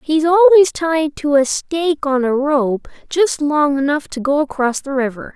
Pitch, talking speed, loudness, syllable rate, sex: 295 Hz, 190 wpm, -16 LUFS, 4.4 syllables/s, female